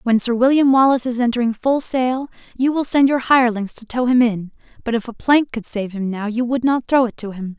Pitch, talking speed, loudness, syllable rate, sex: 240 Hz, 255 wpm, -18 LUFS, 5.6 syllables/s, female